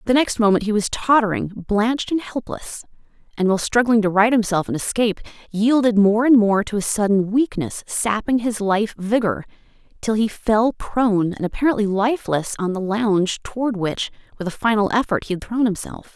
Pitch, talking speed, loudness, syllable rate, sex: 215 Hz, 185 wpm, -20 LUFS, 5.3 syllables/s, female